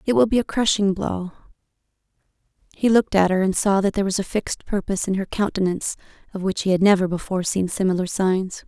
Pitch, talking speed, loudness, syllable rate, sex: 195 Hz, 210 wpm, -21 LUFS, 6.5 syllables/s, female